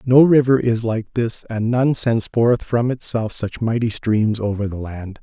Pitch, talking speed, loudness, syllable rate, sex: 115 Hz, 195 wpm, -19 LUFS, 4.2 syllables/s, male